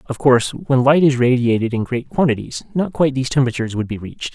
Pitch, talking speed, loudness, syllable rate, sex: 130 Hz, 220 wpm, -18 LUFS, 6.7 syllables/s, male